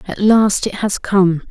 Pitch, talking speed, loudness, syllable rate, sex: 200 Hz, 200 wpm, -15 LUFS, 3.7 syllables/s, female